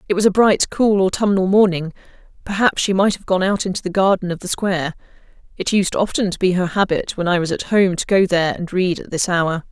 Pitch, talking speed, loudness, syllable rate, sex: 190 Hz, 240 wpm, -18 LUFS, 5.9 syllables/s, female